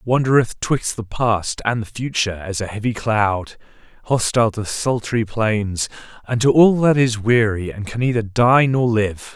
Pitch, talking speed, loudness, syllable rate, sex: 115 Hz, 165 wpm, -19 LUFS, 4.4 syllables/s, male